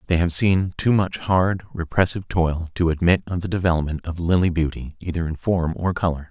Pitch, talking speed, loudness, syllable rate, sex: 85 Hz, 200 wpm, -22 LUFS, 5.3 syllables/s, male